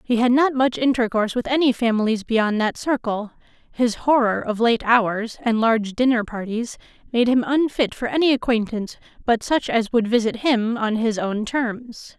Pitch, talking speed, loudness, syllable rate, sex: 235 Hz, 175 wpm, -20 LUFS, 4.9 syllables/s, female